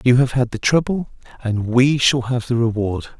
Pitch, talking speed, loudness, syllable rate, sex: 125 Hz, 205 wpm, -18 LUFS, 4.8 syllables/s, male